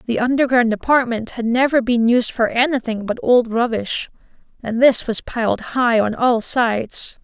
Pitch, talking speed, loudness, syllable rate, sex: 240 Hz, 165 wpm, -18 LUFS, 4.6 syllables/s, female